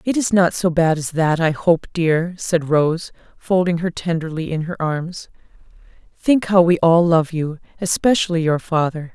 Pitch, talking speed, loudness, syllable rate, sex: 170 Hz, 175 wpm, -18 LUFS, 4.4 syllables/s, female